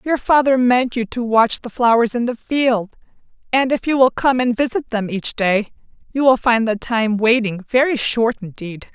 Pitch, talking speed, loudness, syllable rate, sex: 235 Hz, 200 wpm, -17 LUFS, 4.6 syllables/s, female